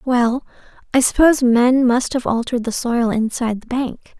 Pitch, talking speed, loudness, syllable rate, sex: 245 Hz, 170 wpm, -17 LUFS, 5.3 syllables/s, female